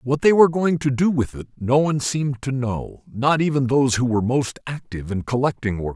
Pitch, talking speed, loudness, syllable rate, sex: 130 Hz, 230 wpm, -21 LUFS, 5.8 syllables/s, male